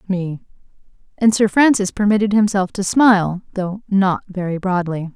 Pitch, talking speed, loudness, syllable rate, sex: 195 Hz, 140 wpm, -17 LUFS, 4.8 syllables/s, female